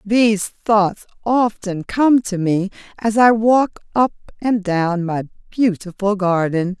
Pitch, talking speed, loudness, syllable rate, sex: 205 Hz, 130 wpm, -18 LUFS, 3.6 syllables/s, female